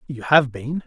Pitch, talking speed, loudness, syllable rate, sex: 135 Hz, 210 wpm, -19 LUFS, 4.3 syllables/s, male